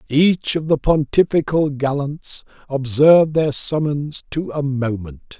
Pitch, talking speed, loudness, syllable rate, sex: 145 Hz, 120 wpm, -18 LUFS, 3.7 syllables/s, male